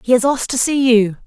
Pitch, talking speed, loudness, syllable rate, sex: 245 Hz, 285 wpm, -15 LUFS, 6.4 syllables/s, female